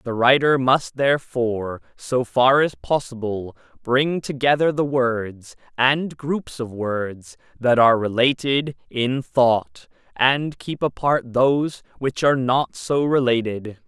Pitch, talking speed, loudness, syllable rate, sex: 125 Hz, 130 wpm, -20 LUFS, 3.7 syllables/s, male